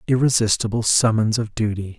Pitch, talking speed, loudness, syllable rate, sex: 110 Hz, 120 wpm, -19 LUFS, 5.5 syllables/s, male